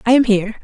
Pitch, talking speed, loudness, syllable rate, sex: 225 Hz, 285 wpm, -15 LUFS, 8.9 syllables/s, female